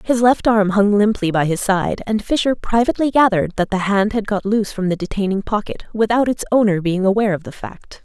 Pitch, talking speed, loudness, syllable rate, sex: 210 Hz, 225 wpm, -17 LUFS, 5.8 syllables/s, female